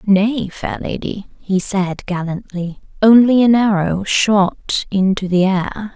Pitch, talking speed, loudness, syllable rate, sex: 200 Hz, 130 wpm, -16 LUFS, 3.5 syllables/s, female